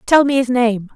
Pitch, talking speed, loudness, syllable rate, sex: 245 Hz, 250 wpm, -15 LUFS, 5.0 syllables/s, female